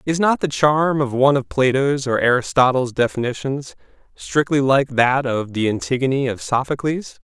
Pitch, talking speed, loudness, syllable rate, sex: 135 Hz, 155 wpm, -19 LUFS, 4.9 syllables/s, male